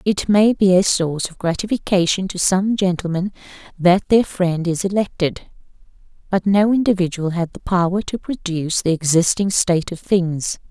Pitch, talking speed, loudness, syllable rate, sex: 185 Hz, 155 wpm, -18 LUFS, 5.0 syllables/s, female